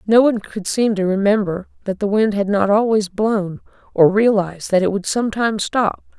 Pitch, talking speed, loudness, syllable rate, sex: 205 Hz, 195 wpm, -18 LUFS, 5.3 syllables/s, female